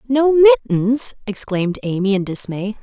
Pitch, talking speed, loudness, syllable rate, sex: 225 Hz, 125 wpm, -17 LUFS, 5.1 syllables/s, female